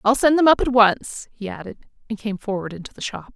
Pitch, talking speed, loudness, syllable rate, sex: 225 Hz, 250 wpm, -20 LUFS, 5.9 syllables/s, female